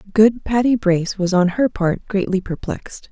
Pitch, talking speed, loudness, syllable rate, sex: 200 Hz, 175 wpm, -18 LUFS, 5.0 syllables/s, female